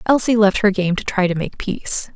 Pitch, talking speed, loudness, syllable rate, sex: 200 Hz, 250 wpm, -18 LUFS, 5.4 syllables/s, female